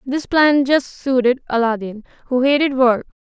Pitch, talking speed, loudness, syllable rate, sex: 260 Hz, 150 wpm, -17 LUFS, 4.6 syllables/s, female